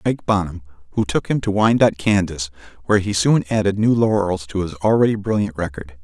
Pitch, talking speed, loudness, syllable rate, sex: 100 Hz, 180 wpm, -19 LUFS, 6.0 syllables/s, male